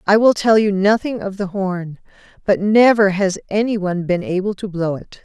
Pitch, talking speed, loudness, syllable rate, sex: 200 Hz, 205 wpm, -17 LUFS, 5.1 syllables/s, female